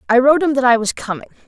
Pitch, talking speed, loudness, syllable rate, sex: 255 Hz, 285 wpm, -15 LUFS, 8.0 syllables/s, female